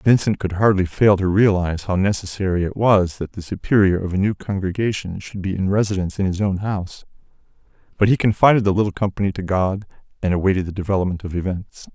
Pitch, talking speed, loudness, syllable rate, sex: 95 Hz, 195 wpm, -20 LUFS, 6.2 syllables/s, male